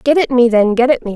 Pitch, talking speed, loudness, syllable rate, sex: 245 Hz, 365 wpm, -12 LUFS, 6.3 syllables/s, female